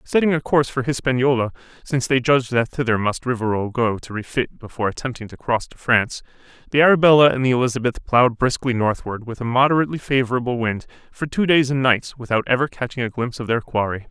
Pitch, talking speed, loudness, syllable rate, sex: 125 Hz, 200 wpm, -20 LUFS, 6.5 syllables/s, male